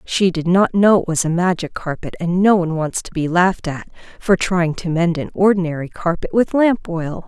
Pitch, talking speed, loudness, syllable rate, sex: 175 Hz, 225 wpm, -18 LUFS, 5.1 syllables/s, female